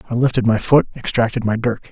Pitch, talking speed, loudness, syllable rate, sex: 120 Hz, 220 wpm, -17 LUFS, 6.2 syllables/s, male